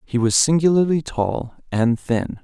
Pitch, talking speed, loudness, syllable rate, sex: 135 Hz, 150 wpm, -19 LUFS, 4.2 syllables/s, male